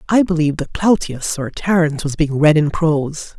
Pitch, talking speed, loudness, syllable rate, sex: 160 Hz, 195 wpm, -17 LUFS, 5.3 syllables/s, female